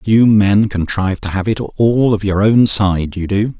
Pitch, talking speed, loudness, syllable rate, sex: 105 Hz, 215 wpm, -14 LUFS, 4.3 syllables/s, male